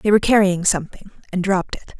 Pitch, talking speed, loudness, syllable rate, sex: 190 Hz, 210 wpm, -18 LUFS, 7.0 syllables/s, female